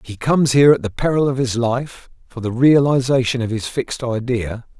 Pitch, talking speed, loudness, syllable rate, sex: 125 Hz, 200 wpm, -17 LUFS, 5.4 syllables/s, male